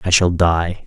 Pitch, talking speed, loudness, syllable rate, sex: 85 Hz, 210 wpm, -16 LUFS, 4.0 syllables/s, male